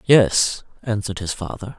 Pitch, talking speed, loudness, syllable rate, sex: 105 Hz, 135 wpm, -21 LUFS, 4.6 syllables/s, male